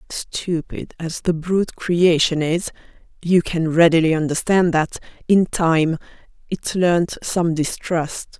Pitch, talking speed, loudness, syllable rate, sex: 170 Hz, 120 wpm, -19 LUFS, 3.7 syllables/s, female